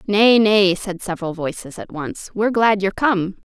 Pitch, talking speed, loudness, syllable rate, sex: 200 Hz, 190 wpm, -18 LUFS, 5.0 syllables/s, female